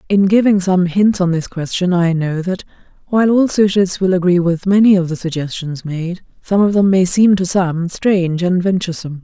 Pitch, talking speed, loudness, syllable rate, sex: 180 Hz, 200 wpm, -15 LUFS, 5.4 syllables/s, female